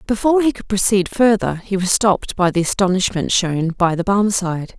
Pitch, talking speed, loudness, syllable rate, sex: 195 Hz, 190 wpm, -17 LUFS, 5.6 syllables/s, female